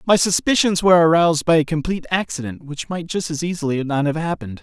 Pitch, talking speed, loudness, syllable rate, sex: 160 Hz, 210 wpm, -19 LUFS, 6.4 syllables/s, male